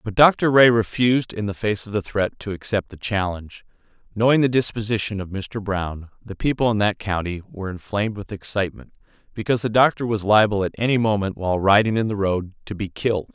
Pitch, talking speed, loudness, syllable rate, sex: 105 Hz, 200 wpm, -21 LUFS, 5.9 syllables/s, male